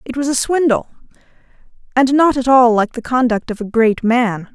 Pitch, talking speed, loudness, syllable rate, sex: 245 Hz, 200 wpm, -15 LUFS, 5.0 syllables/s, female